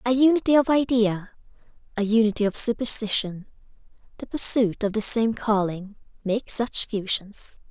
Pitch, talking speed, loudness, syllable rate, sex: 220 Hz, 130 wpm, -22 LUFS, 4.7 syllables/s, female